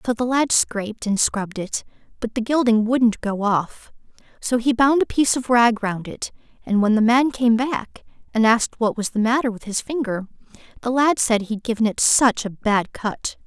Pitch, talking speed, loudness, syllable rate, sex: 230 Hz, 210 wpm, -20 LUFS, 4.9 syllables/s, female